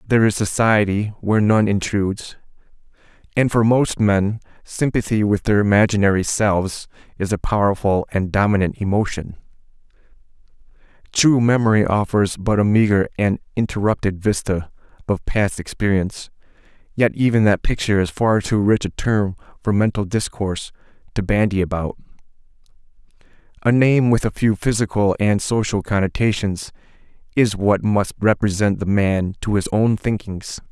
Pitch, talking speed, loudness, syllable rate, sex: 105 Hz, 135 wpm, -19 LUFS, 5.0 syllables/s, male